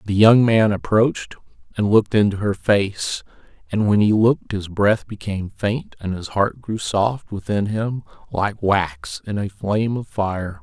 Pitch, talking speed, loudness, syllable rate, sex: 105 Hz, 175 wpm, -20 LUFS, 4.3 syllables/s, male